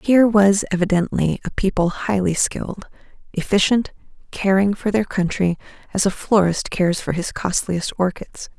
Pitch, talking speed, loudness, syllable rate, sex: 190 Hz, 140 wpm, -19 LUFS, 4.8 syllables/s, female